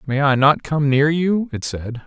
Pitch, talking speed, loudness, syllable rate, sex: 145 Hz, 235 wpm, -18 LUFS, 4.3 syllables/s, male